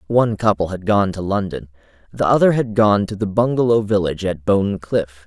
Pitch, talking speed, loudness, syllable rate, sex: 100 Hz, 195 wpm, -18 LUFS, 5.4 syllables/s, male